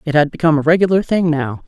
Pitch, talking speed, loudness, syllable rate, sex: 160 Hz, 250 wpm, -15 LUFS, 7.1 syllables/s, female